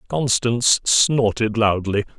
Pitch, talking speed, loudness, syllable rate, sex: 115 Hz, 80 wpm, -18 LUFS, 3.8 syllables/s, male